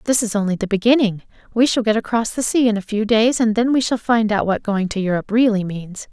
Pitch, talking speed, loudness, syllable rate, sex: 220 Hz, 265 wpm, -18 LUFS, 6.0 syllables/s, female